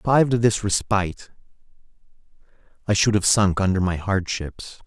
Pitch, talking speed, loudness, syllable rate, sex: 100 Hz, 135 wpm, -21 LUFS, 5.7 syllables/s, male